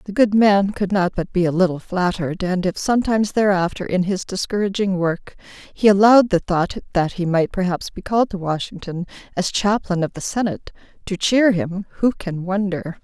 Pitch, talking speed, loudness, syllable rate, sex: 190 Hz, 190 wpm, -19 LUFS, 5.4 syllables/s, female